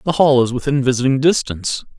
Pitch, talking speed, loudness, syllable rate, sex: 135 Hz, 180 wpm, -16 LUFS, 6.2 syllables/s, male